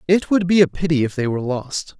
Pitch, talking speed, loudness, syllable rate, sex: 155 Hz, 270 wpm, -19 LUFS, 6.0 syllables/s, male